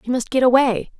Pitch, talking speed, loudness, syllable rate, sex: 245 Hz, 240 wpm, -17 LUFS, 5.9 syllables/s, female